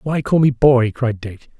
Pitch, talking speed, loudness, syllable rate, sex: 125 Hz, 225 wpm, -16 LUFS, 4.2 syllables/s, male